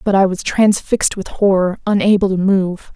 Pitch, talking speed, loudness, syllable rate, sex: 195 Hz, 185 wpm, -15 LUFS, 5.0 syllables/s, female